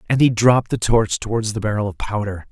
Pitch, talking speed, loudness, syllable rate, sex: 110 Hz, 240 wpm, -19 LUFS, 6.0 syllables/s, male